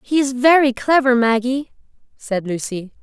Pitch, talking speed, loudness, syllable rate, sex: 250 Hz, 140 wpm, -17 LUFS, 4.5 syllables/s, female